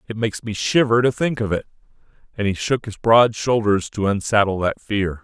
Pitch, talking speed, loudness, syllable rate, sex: 110 Hz, 205 wpm, -20 LUFS, 5.3 syllables/s, male